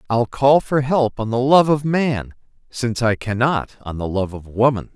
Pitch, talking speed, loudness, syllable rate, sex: 120 Hz, 205 wpm, -19 LUFS, 4.6 syllables/s, male